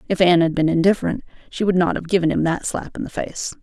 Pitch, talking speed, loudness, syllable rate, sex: 175 Hz, 265 wpm, -20 LUFS, 6.7 syllables/s, female